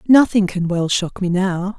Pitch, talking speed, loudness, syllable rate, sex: 190 Hz, 200 wpm, -18 LUFS, 4.3 syllables/s, female